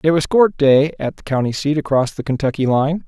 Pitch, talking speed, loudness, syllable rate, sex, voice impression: 145 Hz, 235 wpm, -17 LUFS, 5.5 syllables/s, male, masculine, adult-like, slightly intellectual, slightly calm